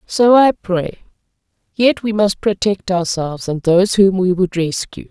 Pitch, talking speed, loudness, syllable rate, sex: 190 Hz, 165 wpm, -15 LUFS, 4.4 syllables/s, female